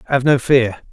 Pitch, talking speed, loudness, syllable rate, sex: 130 Hz, 195 wpm, -15 LUFS, 5.1 syllables/s, male